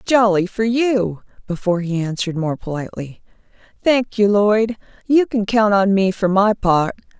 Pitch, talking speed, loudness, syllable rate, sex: 205 Hz, 160 wpm, -18 LUFS, 4.7 syllables/s, female